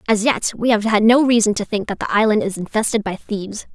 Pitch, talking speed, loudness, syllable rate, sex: 215 Hz, 255 wpm, -18 LUFS, 6.0 syllables/s, female